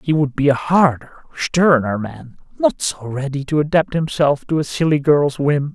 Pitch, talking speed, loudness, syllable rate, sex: 145 Hz, 190 wpm, -17 LUFS, 4.5 syllables/s, male